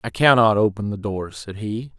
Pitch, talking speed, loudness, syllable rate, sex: 110 Hz, 210 wpm, -20 LUFS, 4.9 syllables/s, male